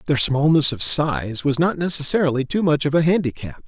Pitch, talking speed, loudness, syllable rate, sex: 145 Hz, 195 wpm, -18 LUFS, 5.4 syllables/s, male